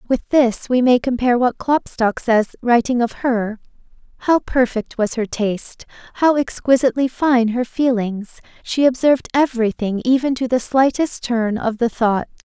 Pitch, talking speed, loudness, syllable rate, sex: 245 Hz, 155 wpm, -18 LUFS, 4.8 syllables/s, female